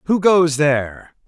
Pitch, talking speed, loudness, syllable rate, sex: 155 Hz, 140 wpm, -16 LUFS, 4.0 syllables/s, male